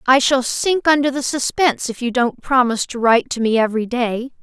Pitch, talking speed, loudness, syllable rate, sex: 250 Hz, 215 wpm, -17 LUFS, 5.7 syllables/s, female